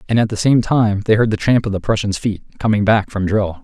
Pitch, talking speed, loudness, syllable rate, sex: 105 Hz, 280 wpm, -17 LUFS, 5.6 syllables/s, male